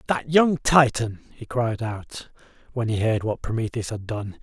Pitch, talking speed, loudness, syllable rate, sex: 120 Hz, 175 wpm, -23 LUFS, 4.4 syllables/s, male